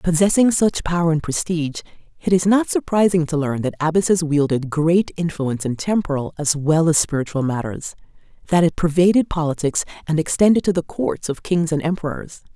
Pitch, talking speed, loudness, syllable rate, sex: 160 Hz, 170 wpm, -19 LUFS, 5.5 syllables/s, female